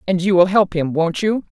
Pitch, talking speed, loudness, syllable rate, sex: 185 Hz, 265 wpm, -17 LUFS, 5.2 syllables/s, female